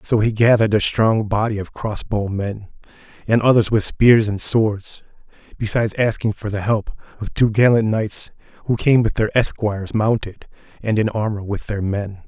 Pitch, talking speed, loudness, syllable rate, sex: 110 Hz, 175 wpm, -19 LUFS, 4.8 syllables/s, male